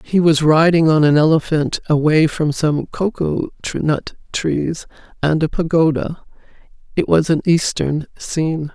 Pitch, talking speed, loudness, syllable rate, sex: 155 Hz, 135 wpm, -17 LUFS, 5.7 syllables/s, female